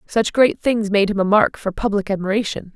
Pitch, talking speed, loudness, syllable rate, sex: 205 Hz, 215 wpm, -18 LUFS, 5.4 syllables/s, female